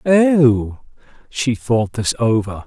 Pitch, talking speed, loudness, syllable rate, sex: 125 Hz, 110 wpm, -17 LUFS, 2.9 syllables/s, male